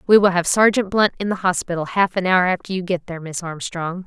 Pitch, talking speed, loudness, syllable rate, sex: 180 Hz, 250 wpm, -19 LUFS, 5.9 syllables/s, female